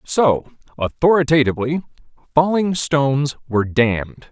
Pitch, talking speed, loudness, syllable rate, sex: 140 Hz, 85 wpm, -18 LUFS, 4.8 syllables/s, male